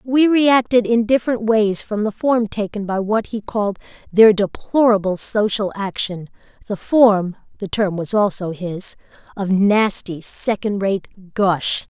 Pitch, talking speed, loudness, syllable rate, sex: 210 Hz, 140 wpm, -18 LUFS, 3.7 syllables/s, female